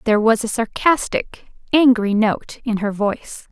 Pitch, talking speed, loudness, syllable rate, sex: 225 Hz, 155 wpm, -18 LUFS, 4.4 syllables/s, female